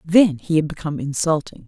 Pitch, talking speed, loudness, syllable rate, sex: 160 Hz, 180 wpm, -20 LUFS, 5.7 syllables/s, female